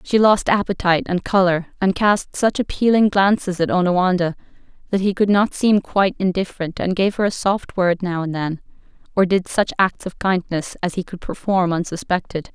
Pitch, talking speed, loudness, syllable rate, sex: 190 Hz, 185 wpm, -19 LUFS, 5.2 syllables/s, female